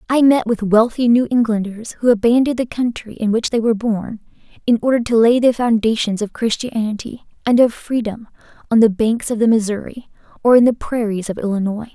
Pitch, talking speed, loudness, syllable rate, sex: 225 Hz, 190 wpm, -17 LUFS, 5.7 syllables/s, female